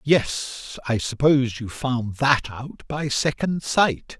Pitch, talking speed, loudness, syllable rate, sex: 130 Hz, 145 wpm, -23 LUFS, 3.3 syllables/s, male